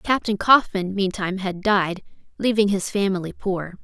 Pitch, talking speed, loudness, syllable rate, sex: 195 Hz, 140 wpm, -21 LUFS, 4.7 syllables/s, female